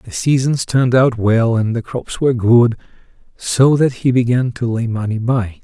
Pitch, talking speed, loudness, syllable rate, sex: 120 Hz, 190 wpm, -15 LUFS, 4.6 syllables/s, male